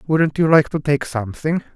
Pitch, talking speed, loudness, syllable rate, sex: 150 Hz, 205 wpm, -18 LUFS, 5.3 syllables/s, male